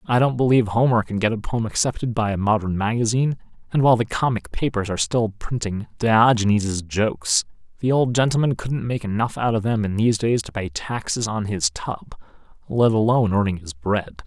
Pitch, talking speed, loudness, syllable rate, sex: 110 Hz, 195 wpm, -21 LUFS, 5.6 syllables/s, male